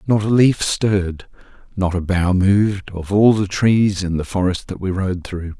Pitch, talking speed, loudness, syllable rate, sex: 95 Hz, 195 wpm, -18 LUFS, 4.5 syllables/s, male